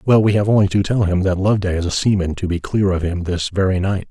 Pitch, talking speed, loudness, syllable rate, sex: 95 Hz, 295 wpm, -18 LUFS, 6.3 syllables/s, male